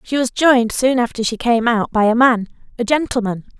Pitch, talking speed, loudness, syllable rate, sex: 240 Hz, 215 wpm, -16 LUFS, 5.5 syllables/s, female